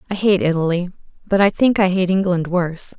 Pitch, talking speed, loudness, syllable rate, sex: 185 Hz, 200 wpm, -18 LUFS, 5.8 syllables/s, female